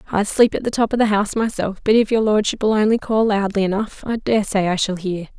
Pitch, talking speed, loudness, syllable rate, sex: 210 Hz, 245 wpm, -19 LUFS, 6.0 syllables/s, female